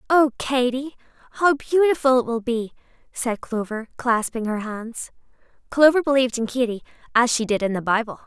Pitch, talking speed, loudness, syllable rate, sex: 245 Hz, 160 wpm, -21 LUFS, 5.2 syllables/s, female